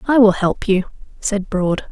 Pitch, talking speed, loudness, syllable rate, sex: 200 Hz, 190 wpm, -18 LUFS, 4.5 syllables/s, female